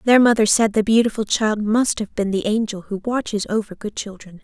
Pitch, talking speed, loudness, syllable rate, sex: 215 Hz, 215 wpm, -19 LUFS, 5.5 syllables/s, female